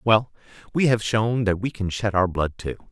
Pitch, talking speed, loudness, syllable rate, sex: 105 Hz, 225 wpm, -23 LUFS, 4.8 syllables/s, male